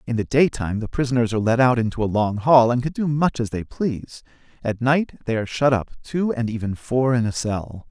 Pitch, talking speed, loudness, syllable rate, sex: 120 Hz, 245 wpm, -21 LUFS, 5.7 syllables/s, male